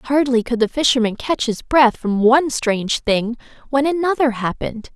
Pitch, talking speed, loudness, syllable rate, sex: 250 Hz, 170 wpm, -18 LUFS, 5.0 syllables/s, female